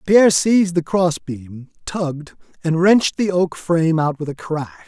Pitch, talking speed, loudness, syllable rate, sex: 165 Hz, 170 wpm, -18 LUFS, 4.9 syllables/s, male